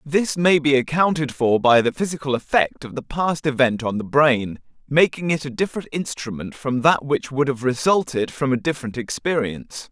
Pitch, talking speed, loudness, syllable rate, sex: 140 Hz, 190 wpm, -20 LUFS, 5.2 syllables/s, male